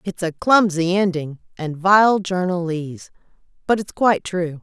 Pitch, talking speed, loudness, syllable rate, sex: 180 Hz, 145 wpm, -19 LUFS, 4.5 syllables/s, female